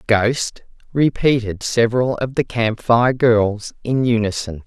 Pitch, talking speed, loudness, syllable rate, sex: 115 Hz, 130 wpm, -18 LUFS, 3.9 syllables/s, female